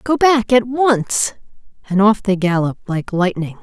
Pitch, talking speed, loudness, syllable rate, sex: 210 Hz, 165 wpm, -16 LUFS, 4.4 syllables/s, female